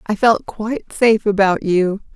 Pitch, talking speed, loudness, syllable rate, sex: 210 Hz, 165 wpm, -17 LUFS, 4.6 syllables/s, female